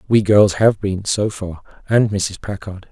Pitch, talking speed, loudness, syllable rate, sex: 100 Hz, 185 wpm, -17 LUFS, 4.1 syllables/s, male